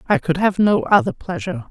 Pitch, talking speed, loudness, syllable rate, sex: 195 Hz, 210 wpm, -18 LUFS, 5.9 syllables/s, female